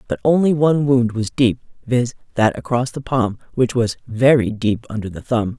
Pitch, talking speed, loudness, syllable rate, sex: 120 Hz, 195 wpm, -18 LUFS, 5.0 syllables/s, female